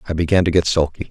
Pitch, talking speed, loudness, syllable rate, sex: 85 Hz, 270 wpm, -17 LUFS, 7.5 syllables/s, male